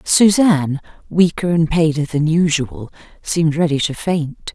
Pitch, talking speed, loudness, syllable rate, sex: 160 Hz, 130 wpm, -16 LUFS, 4.2 syllables/s, female